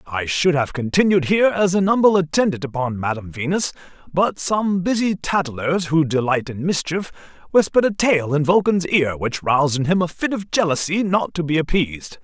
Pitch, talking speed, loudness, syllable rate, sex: 165 Hz, 185 wpm, -19 LUFS, 5.3 syllables/s, male